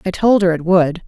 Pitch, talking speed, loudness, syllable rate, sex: 180 Hz, 280 wpm, -14 LUFS, 5.2 syllables/s, female